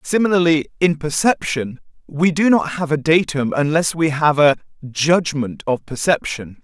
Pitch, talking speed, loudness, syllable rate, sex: 155 Hz, 145 wpm, -17 LUFS, 4.5 syllables/s, male